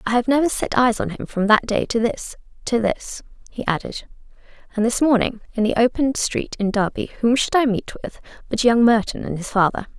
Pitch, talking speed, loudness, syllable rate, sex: 230 Hz, 210 wpm, -20 LUFS, 5.4 syllables/s, female